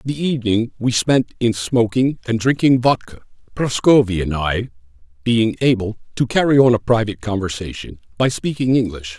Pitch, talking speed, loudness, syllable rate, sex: 115 Hz, 150 wpm, -18 LUFS, 5.1 syllables/s, male